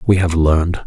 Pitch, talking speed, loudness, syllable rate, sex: 85 Hz, 210 wpm, -15 LUFS, 4.8 syllables/s, male